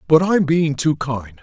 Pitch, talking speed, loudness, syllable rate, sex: 150 Hz, 210 wpm, -18 LUFS, 4.0 syllables/s, male